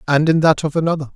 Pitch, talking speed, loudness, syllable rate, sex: 155 Hz, 260 wpm, -16 LUFS, 7.1 syllables/s, male